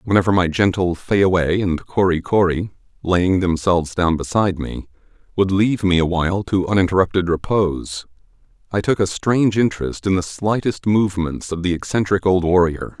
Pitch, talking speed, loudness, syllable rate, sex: 95 Hz, 150 wpm, -18 LUFS, 5.3 syllables/s, male